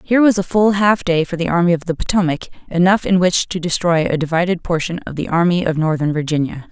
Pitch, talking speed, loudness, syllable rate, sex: 175 Hz, 230 wpm, -17 LUFS, 6.1 syllables/s, female